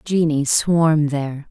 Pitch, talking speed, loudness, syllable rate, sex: 155 Hz, 120 wpm, -18 LUFS, 3.6 syllables/s, female